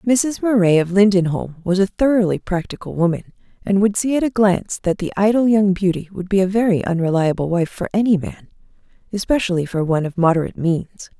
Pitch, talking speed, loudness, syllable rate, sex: 190 Hz, 190 wpm, -18 LUFS, 6.0 syllables/s, female